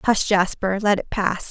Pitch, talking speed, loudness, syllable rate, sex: 200 Hz, 200 wpm, -20 LUFS, 4.6 syllables/s, female